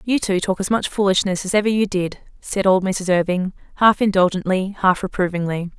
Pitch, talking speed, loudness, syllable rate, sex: 190 Hz, 185 wpm, -19 LUFS, 5.5 syllables/s, female